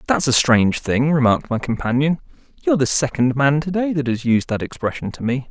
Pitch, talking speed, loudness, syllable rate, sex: 135 Hz, 230 wpm, -19 LUFS, 6.2 syllables/s, male